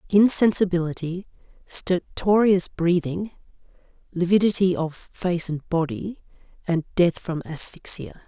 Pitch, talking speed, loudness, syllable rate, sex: 180 Hz, 85 wpm, -22 LUFS, 4.1 syllables/s, female